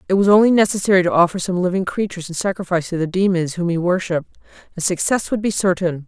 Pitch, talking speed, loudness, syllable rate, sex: 180 Hz, 215 wpm, -18 LUFS, 7.0 syllables/s, female